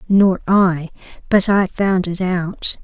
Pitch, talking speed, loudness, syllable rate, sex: 185 Hz, 150 wpm, -17 LUFS, 3.2 syllables/s, female